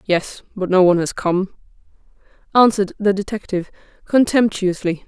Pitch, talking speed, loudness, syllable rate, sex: 195 Hz, 120 wpm, -18 LUFS, 5.5 syllables/s, female